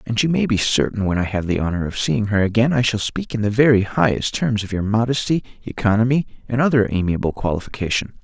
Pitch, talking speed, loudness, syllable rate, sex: 110 Hz, 220 wpm, -19 LUFS, 6.1 syllables/s, male